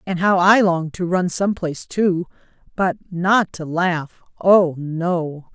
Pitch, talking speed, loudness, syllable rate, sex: 175 Hz, 150 wpm, -19 LUFS, 3.7 syllables/s, female